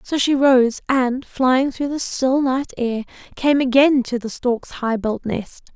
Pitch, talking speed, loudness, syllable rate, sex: 255 Hz, 190 wpm, -19 LUFS, 3.7 syllables/s, female